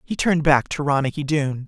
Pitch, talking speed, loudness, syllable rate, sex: 145 Hz, 215 wpm, -20 LUFS, 6.4 syllables/s, male